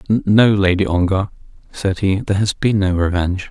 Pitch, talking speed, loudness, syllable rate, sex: 95 Hz, 170 wpm, -16 LUFS, 5.1 syllables/s, male